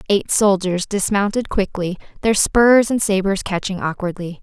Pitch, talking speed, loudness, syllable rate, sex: 195 Hz, 135 wpm, -18 LUFS, 4.6 syllables/s, female